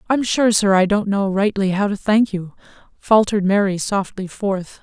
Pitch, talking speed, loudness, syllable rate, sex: 200 Hz, 185 wpm, -18 LUFS, 4.8 syllables/s, female